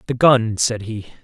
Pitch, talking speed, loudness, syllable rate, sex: 110 Hz, 195 wpm, -17 LUFS, 4.1 syllables/s, male